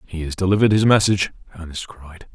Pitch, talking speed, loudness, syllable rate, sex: 90 Hz, 180 wpm, -18 LUFS, 6.9 syllables/s, male